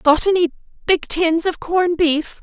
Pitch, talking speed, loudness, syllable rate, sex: 335 Hz, 175 wpm, -17 LUFS, 4.4 syllables/s, female